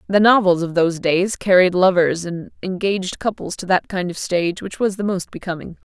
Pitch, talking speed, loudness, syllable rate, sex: 185 Hz, 205 wpm, -19 LUFS, 5.4 syllables/s, female